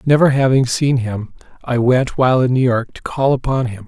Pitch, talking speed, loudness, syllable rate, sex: 125 Hz, 215 wpm, -16 LUFS, 5.2 syllables/s, male